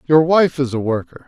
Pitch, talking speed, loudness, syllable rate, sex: 145 Hz, 235 wpm, -17 LUFS, 5.5 syllables/s, male